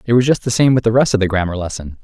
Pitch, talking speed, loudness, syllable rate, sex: 110 Hz, 355 wpm, -15 LUFS, 7.3 syllables/s, male